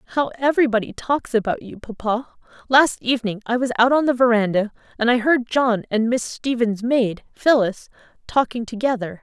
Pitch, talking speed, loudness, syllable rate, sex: 235 Hz, 165 wpm, -20 LUFS, 5.2 syllables/s, female